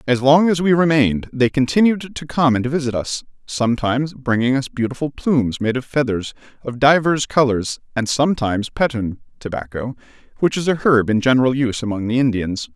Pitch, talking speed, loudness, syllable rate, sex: 130 Hz, 175 wpm, -18 LUFS, 5.7 syllables/s, male